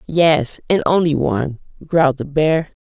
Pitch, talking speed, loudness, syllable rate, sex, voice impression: 155 Hz, 150 wpm, -17 LUFS, 4.5 syllables/s, female, feminine, adult-like, slightly weak, hard, halting, calm, slightly friendly, unique, modest